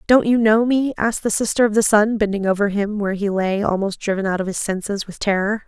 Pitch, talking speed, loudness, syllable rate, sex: 210 Hz, 255 wpm, -19 LUFS, 6.0 syllables/s, female